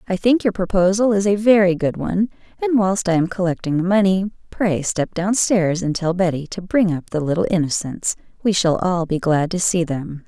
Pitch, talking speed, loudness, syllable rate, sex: 185 Hz, 210 wpm, -19 LUFS, 5.2 syllables/s, female